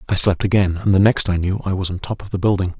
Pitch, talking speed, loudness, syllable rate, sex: 95 Hz, 320 wpm, -18 LUFS, 6.6 syllables/s, male